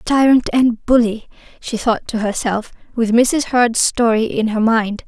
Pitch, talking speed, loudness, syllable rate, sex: 230 Hz, 165 wpm, -16 LUFS, 4.1 syllables/s, female